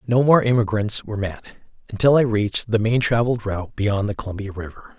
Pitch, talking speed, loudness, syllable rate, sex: 110 Hz, 190 wpm, -20 LUFS, 6.0 syllables/s, male